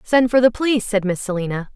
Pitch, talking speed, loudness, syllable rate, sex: 220 Hz, 240 wpm, -18 LUFS, 6.7 syllables/s, female